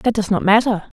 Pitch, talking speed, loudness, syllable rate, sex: 210 Hz, 245 wpm, -17 LUFS, 5.6 syllables/s, female